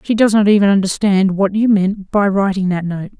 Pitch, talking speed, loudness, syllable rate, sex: 200 Hz, 225 wpm, -14 LUFS, 5.3 syllables/s, female